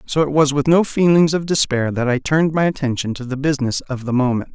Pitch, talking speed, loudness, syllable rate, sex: 140 Hz, 250 wpm, -18 LUFS, 6.1 syllables/s, male